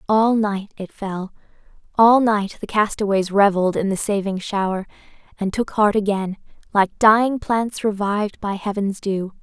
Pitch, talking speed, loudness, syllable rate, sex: 205 Hz, 155 wpm, -20 LUFS, 4.6 syllables/s, female